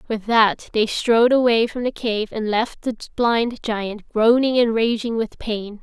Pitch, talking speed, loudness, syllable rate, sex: 225 Hz, 185 wpm, -20 LUFS, 4.1 syllables/s, female